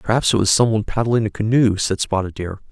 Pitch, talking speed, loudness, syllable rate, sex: 105 Hz, 245 wpm, -18 LUFS, 6.3 syllables/s, male